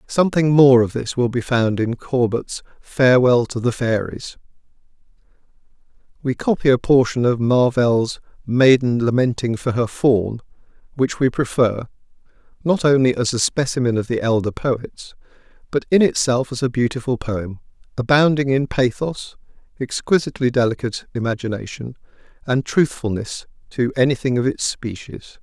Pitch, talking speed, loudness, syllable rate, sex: 125 Hz, 130 wpm, -19 LUFS, 4.9 syllables/s, male